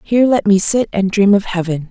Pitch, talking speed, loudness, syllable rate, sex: 205 Hz, 250 wpm, -14 LUFS, 5.6 syllables/s, female